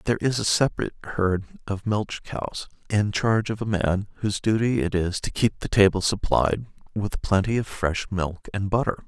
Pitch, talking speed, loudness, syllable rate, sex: 105 Hz, 190 wpm, -24 LUFS, 5.2 syllables/s, male